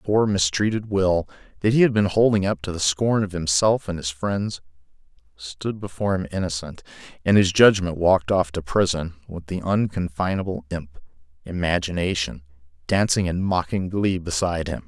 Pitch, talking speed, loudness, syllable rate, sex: 90 Hz, 160 wpm, -22 LUFS, 5.3 syllables/s, male